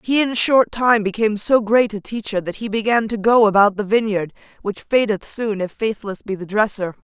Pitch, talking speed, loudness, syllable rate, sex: 215 Hz, 210 wpm, -18 LUFS, 5.2 syllables/s, female